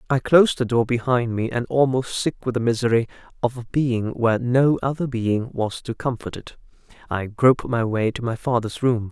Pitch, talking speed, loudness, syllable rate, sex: 120 Hz, 205 wpm, -21 LUFS, 5.1 syllables/s, male